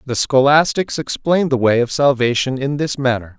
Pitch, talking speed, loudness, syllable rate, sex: 135 Hz, 175 wpm, -16 LUFS, 5.0 syllables/s, male